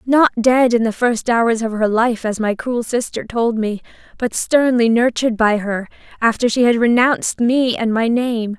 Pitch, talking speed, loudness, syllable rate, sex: 235 Hz, 195 wpm, -17 LUFS, 4.5 syllables/s, female